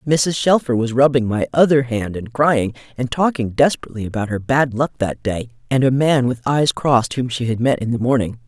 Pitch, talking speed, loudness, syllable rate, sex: 125 Hz, 220 wpm, -18 LUFS, 5.5 syllables/s, female